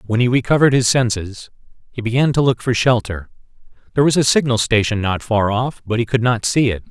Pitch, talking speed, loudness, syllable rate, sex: 120 Hz, 215 wpm, -17 LUFS, 6.1 syllables/s, male